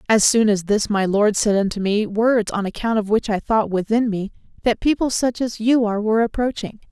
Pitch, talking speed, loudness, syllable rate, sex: 215 Hz, 225 wpm, -19 LUFS, 5.4 syllables/s, female